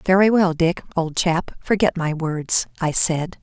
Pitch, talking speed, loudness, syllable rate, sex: 170 Hz, 175 wpm, -20 LUFS, 4.0 syllables/s, female